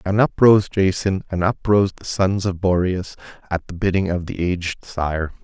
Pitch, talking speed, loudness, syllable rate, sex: 95 Hz, 200 wpm, -20 LUFS, 4.7 syllables/s, male